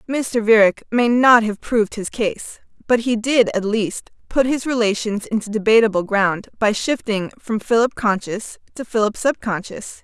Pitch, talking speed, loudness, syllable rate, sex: 220 Hz, 160 wpm, -18 LUFS, 4.6 syllables/s, female